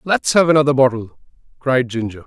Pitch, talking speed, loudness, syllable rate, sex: 135 Hz, 160 wpm, -16 LUFS, 5.7 syllables/s, male